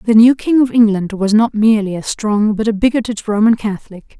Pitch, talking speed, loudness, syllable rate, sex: 220 Hz, 215 wpm, -14 LUFS, 5.6 syllables/s, female